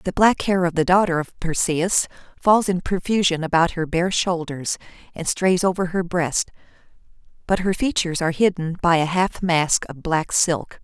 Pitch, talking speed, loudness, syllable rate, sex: 175 Hz, 175 wpm, -21 LUFS, 4.8 syllables/s, female